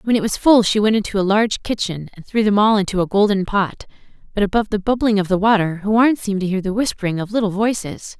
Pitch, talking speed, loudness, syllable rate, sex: 205 Hz, 250 wpm, -18 LUFS, 6.4 syllables/s, female